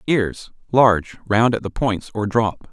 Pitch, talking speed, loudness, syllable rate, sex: 110 Hz, 155 wpm, -19 LUFS, 4.0 syllables/s, male